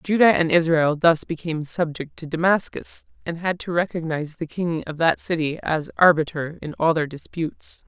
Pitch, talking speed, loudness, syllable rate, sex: 165 Hz, 175 wpm, -22 LUFS, 5.0 syllables/s, female